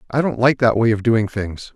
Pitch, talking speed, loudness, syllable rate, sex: 115 Hz, 275 wpm, -18 LUFS, 5.2 syllables/s, male